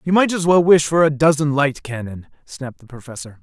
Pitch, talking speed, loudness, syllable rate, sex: 145 Hz, 225 wpm, -16 LUFS, 5.7 syllables/s, male